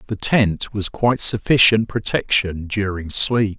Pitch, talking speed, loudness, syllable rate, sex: 105 Hz, 135 wpm, -17 LUFS, 4.1 syllables/s, male